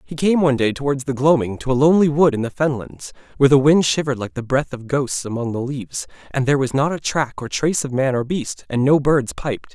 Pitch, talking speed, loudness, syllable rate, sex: 140 Hz, 260 wpm, -19 LUFS, 6.1 syllables/s, male